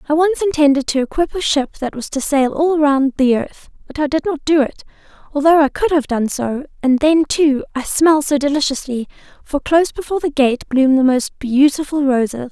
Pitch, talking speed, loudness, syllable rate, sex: 285 Hz, 210 wpm, -16 LUFS, 5.3 syllables/s, female